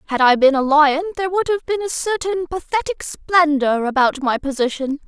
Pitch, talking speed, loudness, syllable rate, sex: 315 Hz, 190 wpm, -18 LUFS, 5.2 syllables/s, female